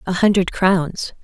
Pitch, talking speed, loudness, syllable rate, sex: 185 Hz, 145 wpm, -17 LUFS, 3.9 syllables/s, female